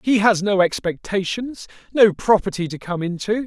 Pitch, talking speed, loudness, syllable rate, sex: 200 Hz, 155 wpm, -20 LUFS, 4.8 syllables/s, male